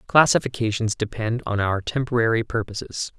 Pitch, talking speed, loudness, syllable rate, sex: 115 Hz, 115 wpm, -23 LUFS, 5.4 syllables/s, male